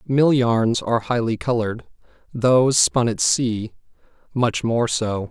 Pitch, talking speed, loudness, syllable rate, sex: 120 Hz, 135 wpm, -20 LUFS, 4.1 syllables/s, male